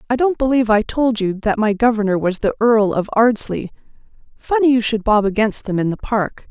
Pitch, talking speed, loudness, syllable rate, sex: 220 Hz, 210 wpm, -17 LUFS, 5.5 syllables/s, female